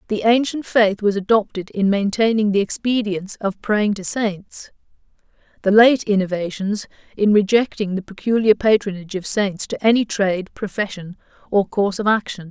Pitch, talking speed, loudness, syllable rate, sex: 205 Hz, 150 wpm, -19 LUFS, 5.1 syllables/s, female